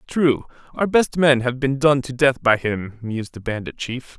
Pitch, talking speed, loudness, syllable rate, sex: 130 Hz, 215 wpm, -20 LUFS, 4.5 syllables/s, male